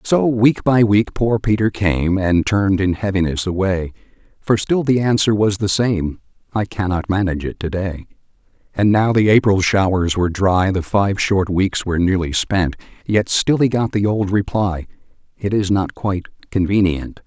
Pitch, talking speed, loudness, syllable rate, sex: 100 Hz, 175 wpm, -17 LUFS, 4.6 syllables/s, male